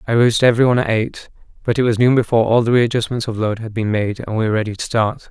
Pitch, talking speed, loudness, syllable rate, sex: 115 Hz, 270 wpm, -17 LUFS, 7.0 syllables/s, male